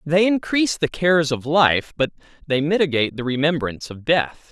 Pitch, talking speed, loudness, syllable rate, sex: 150 Hz, 175 wpm, -20 LUFS, 5.5 syllables/s, male